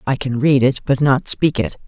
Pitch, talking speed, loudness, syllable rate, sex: 130 Hz, 255 wpm, -17 LUFS, 4.9 syllables/s, female